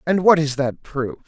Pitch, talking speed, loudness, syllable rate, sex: 145 Hz, 235 wpm, -19 LUFS, 4.6 syllables/s, male